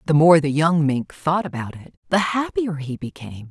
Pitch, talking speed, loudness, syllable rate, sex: 155 Hz, 205 wpm, -20 LUFS, 5.0 syllables/s, female